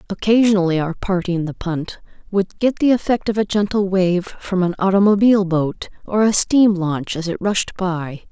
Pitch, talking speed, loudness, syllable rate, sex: 190 Hz, 190 wpm, -18 LUFS, 4.9 syllables/s, female